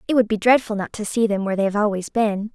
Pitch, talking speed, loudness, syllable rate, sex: 215 Hz, 305 wpm, -20 LUFS, 6.8 syllables/s, female